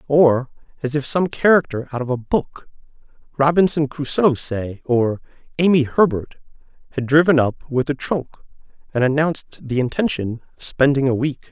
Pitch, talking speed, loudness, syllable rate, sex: 140 Hz, 150 wpm, -19 LUFS, 4.9 syllables/s, male